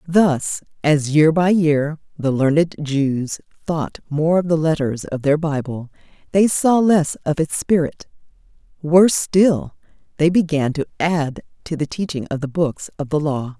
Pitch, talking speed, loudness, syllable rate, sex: 155 Hz, 165 wpm, -19 LUFS, 4.1 syllables/s, female